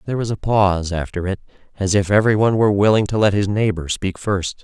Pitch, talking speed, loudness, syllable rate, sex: 100 Hz, 220 wpm, -18 LUFS, 6.3 syllables/s, male